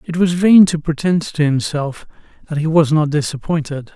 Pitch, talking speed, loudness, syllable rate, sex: 155 Hz, 180 wpm, -16 LUFS, 5.0 syllables/s, male